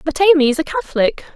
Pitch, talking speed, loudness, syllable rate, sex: 310 Hz, 220 wpm, -16 LUFS, 6.8 syllables/s, female